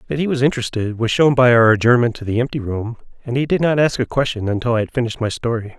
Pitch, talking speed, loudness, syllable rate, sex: 120 Hz, 270 wpm, -17 LUFS, 7.0 syllables/s, male